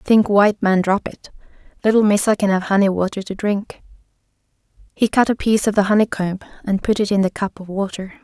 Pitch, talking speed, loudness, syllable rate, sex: 200 Hz, 205 wpm, -18 LUFS, 6.0 syllables/s, female